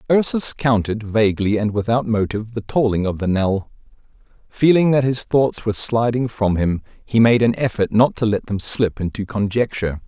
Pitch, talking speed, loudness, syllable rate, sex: 110 Hz, 180 wpm, -19 LUFS, 5.2 syllables/s, male